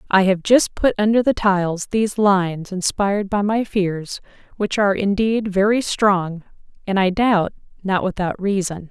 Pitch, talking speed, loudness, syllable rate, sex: 195 Hz, 160 wpm, -19 LUFS, 4.6 syllables/s, female